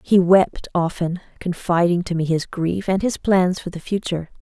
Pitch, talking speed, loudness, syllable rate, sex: 175 Hz, 190 wpm, -20 LUFS, 4.8 syllables/s, female